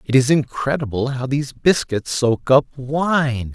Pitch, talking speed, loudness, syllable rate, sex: 135 Hz, 150 wpm, -19 LUFS, 4.1 syllables/s, male